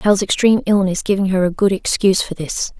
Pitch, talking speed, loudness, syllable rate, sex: 195 Hz, 215 wpm, -16 LUFS, 6.3 syllables/s, female